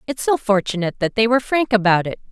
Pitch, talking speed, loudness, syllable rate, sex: 220 Hz, 210 wpm, -18 LUFS, 6.5 syllables/s, female